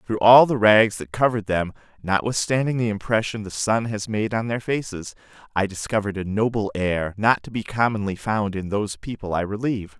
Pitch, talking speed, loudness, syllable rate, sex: 105 Hz, 190 wpm, -22 LUFS, 5.4 syllables/s, male